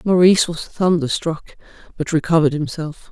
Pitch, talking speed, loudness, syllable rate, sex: 165 Hz, 115 wpm, -18 LUFS, 5.4 syllables/s, female